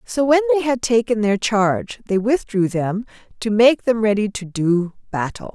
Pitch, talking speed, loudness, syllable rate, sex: 220 Hz, 185 wpm, -19 LUFS, 4.7 syllables/s, female